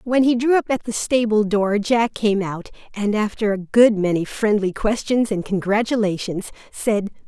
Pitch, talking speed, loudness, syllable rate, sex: 215 Hz, 175 wpm, -20 LUFS, 4.7 syllables/s, female